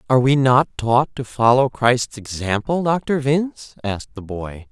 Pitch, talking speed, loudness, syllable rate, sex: 125 Hz, 165 wpm, -19 LUFS, 4.4 syllables/s, male